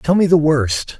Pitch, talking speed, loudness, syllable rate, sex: 155 Hz, 240 wpm, -15 LUFS, 4.2 syllables/s, male